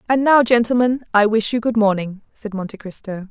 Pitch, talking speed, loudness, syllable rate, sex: 220 Hz, 200 wpm, -17 LUFS, 5.5 syllables/s, female